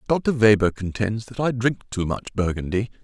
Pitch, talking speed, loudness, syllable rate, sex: 110 Hz, 180 wpm, -22 LUFS, 5.0 syllables/s, male